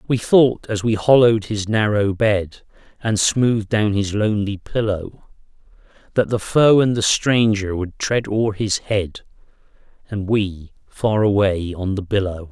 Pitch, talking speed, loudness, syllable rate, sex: 105 Hz, 155 wpm, -19 LUFS, 4.1 syllables/s, male